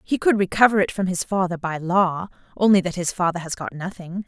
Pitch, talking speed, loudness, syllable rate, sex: 190 Hz, 225 wpm, -21 LUFS, 5.6 syllables/s, female